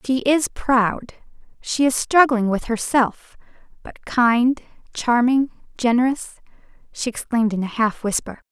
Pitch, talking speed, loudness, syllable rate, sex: 245 Hz, 125 wpm, -20 LUFS, 4.1 syllables/s, female